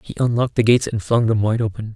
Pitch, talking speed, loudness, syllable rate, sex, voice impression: 115 Hz, 275 wpm, -19 LUFS, 7.2 syllables/s, male, masculine, adult-like, relaxed, weak, slightly dark, soft, raspy, intellectual, calm, reassuring, slightly wild, kind, modest